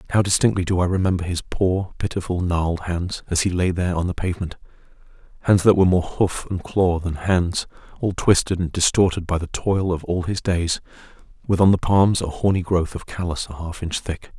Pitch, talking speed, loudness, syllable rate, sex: 90 Hz, 205 wpm, -21 LUFS, 5.5 syllables/s, male